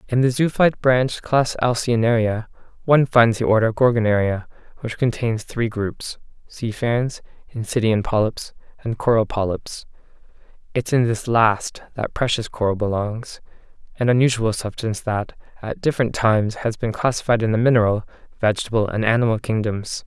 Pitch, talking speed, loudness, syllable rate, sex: 115 Hz, 140 wpm, -20 LUFS, 5.2 syllables/s, male